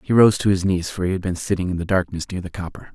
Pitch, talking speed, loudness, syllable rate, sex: 90 Hz, 325 wpm, -21 LUFS, 6.8 syllables/s, male